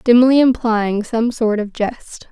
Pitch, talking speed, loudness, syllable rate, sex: 230 Hz, 155 wpm, -16 LUFS, 3.6 syllables/s, female